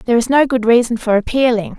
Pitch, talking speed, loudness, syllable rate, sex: 235 Hz, 235 wpm, -14 LUFS, 6.3 syllables/s, female